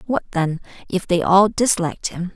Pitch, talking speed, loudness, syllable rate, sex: 185 Hz, 180 wpm, -19 LUFS, 4.9 syllables/s, female